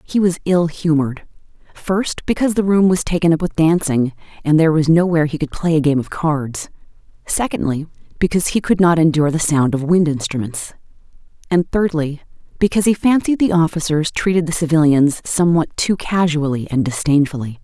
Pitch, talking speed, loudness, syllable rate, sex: 160 Hz, 165 wpm, -17 LUFS, 5.7 syllables/s, female